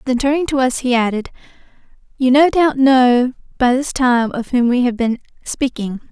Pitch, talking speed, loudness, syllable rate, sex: 255 Hz, 185 wpm, -16 LUFS, 4.8 syllables/s, female